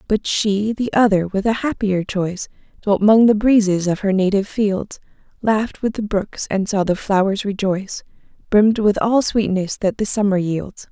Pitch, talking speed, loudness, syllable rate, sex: 205 Hz, 180 wpm, -18 LUFS, 4.9 syllables/s, female